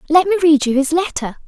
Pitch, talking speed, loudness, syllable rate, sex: 315 Hz, 245 wpm, -15 LUFS, 6.4 syllables/s, female